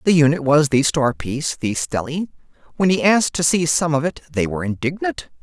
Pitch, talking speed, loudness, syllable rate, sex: 150 Hz, 210 wpm, -19 LUFS, 5.7 syllables/s, male